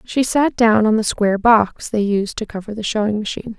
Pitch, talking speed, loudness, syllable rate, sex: 215 Hz, 235 wpm, -17 LUFS, 5.4 syllables/s, female